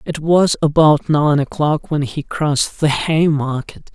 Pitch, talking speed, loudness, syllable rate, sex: 150 Hz, 165 wpm, -16 LUFS, 4.0 syllables/s, male